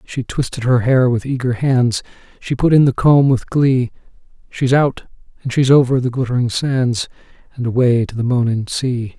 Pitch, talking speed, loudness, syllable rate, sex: 125 Hz, 185 wpm, -16 LUFS, 4.8 syllables/s, male